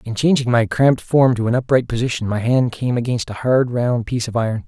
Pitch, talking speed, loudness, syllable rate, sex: 120 Hz, 245 wpm, -18 LUFS, 5.8 syllables/s, male